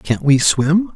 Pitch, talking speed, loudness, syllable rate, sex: 155 Hz, 190 wpm, -15 LUFS, 3.3 syllables/s, male